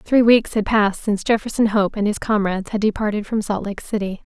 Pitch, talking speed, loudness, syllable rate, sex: 210 Hz, 220 wpm, -19 LUFS, 6.0 syllables/s, female